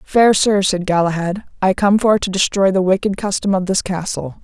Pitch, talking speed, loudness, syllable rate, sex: 195 Hz, 205 wpm, -16 LUFS, 5.1 syllables/s, female